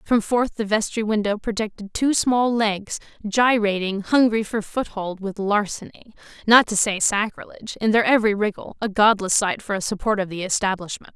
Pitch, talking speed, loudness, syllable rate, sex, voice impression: 210 Hz, 160 wpm, -21 LUFS, 5.2 syllables/s, female, very feminine, slightly young, slightly adult-like, thin, tensed, powerful, very bright, hard, clear, very fluent, slightly cute, cool, slightly intellectual, very refreshing, very sincere, slightly calm, very friendly, reassuring, slightly unique, wild, slightly sweet, very lively, very strict, very intense